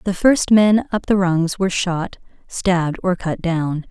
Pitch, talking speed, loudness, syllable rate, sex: 185 Hz, 185 wpm, -18 LUFS, 4.0 syllables/s, female